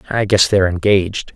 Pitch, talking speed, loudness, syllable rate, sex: 95 Hz, 175 wpm, -15 LUFS, 6.1 syllables/s, male